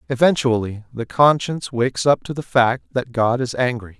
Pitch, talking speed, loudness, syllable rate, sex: 125 Hz, 180 wpm, -19 LUFS, 5.1 syllables/s, male